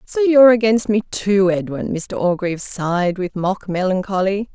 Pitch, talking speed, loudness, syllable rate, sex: 200 Hz, 160 wpm, -18 LUFS, 4.9 syllables/s, female